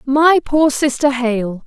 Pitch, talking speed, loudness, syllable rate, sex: 270 Hz, 145 wpm, -15 LUFS, 3.3 syllables/s, female